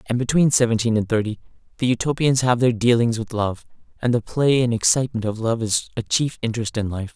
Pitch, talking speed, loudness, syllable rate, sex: 115 Hz, 210 wpm, -20 LUFS, 6.0 syllables/s, male